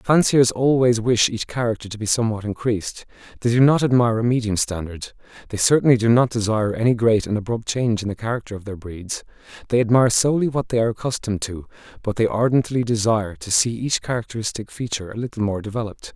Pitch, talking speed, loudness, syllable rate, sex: 115 Hz, 195 wpm, -20 LUFS, 6.6 syllables/s, male